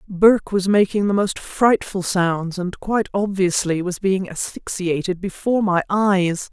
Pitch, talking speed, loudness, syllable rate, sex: 190 Hz, 145 wpm, -20 LUFS, 4.3 syllables/s, female